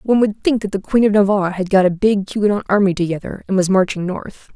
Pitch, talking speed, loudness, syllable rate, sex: 200 Hz, 250 wpm, -17 LUFS, 6.4 syllables/s, female